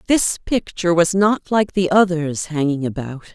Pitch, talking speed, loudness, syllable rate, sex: 175 Hz, 160 wpm, -18 LUFS, 4.7 syllables/s, female